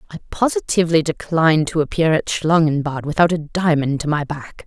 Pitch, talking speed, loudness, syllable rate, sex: 155 Hz, 165 wpm, -18 LUFS, 5.5 syllables/s, female